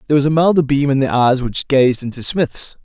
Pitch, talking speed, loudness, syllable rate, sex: 140 Hz, 255 wpm, -15 LUFS, 5.7 syllables/s, male